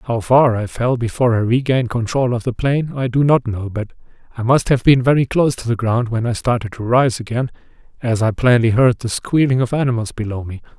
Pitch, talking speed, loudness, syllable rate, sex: 120 Hz, 230 wpm, -17 LUFS, 5.8 syllables/s, male